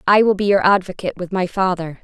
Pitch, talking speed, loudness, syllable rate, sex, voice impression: 190 Hz, 235 wpm, -18 LUFS, 6.6 syllables/s, female, feminine, adult-like, slightly tensed, clear, fluent, slightly calm, friendly